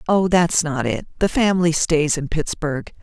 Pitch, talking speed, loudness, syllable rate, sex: 160 Hz, 160 wpm, -19 LUFS, 4.5 syllables/s, female